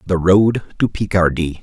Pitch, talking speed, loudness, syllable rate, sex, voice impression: 90 Hz, 150 wpm, -16 LUFS, 4.3 syllables/s, male, very masculine, middle-aged, very thick, tensed, very powerful, slightly dark, soft, very muffled, fluent, raspy, very cool, intellectual, slightly refreshing, sincere, very calm, very mature, very friendly, very reassuring, very unique, slightly elegant, very wild, sweet, lively, very kind, slightly modest